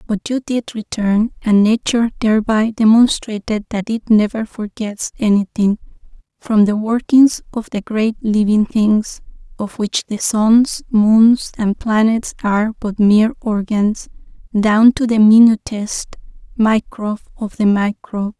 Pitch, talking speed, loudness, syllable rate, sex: 215 Hz, 130 wpm, -15 LUFS, 4.1 syllables/s, female